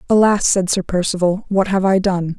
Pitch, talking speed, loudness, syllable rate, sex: 190 Hz, 200 wpm, -16 LUFS, 5.6 syllables/s, female